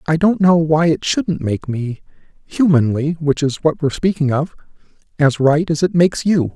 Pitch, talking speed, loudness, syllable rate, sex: 155 Hz, 175 wpm, -16 LUFS, 4.9 syllables/s, male